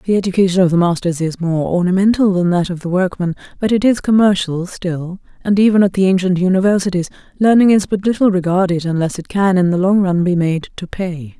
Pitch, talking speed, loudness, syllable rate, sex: 185 Hz, 210 wpm, -15 LUFS, 5.8 syllables/s, female